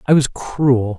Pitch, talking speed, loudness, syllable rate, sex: 130 Hz, 180 wpm, -17 LUFS, 3.5 syllables/s, male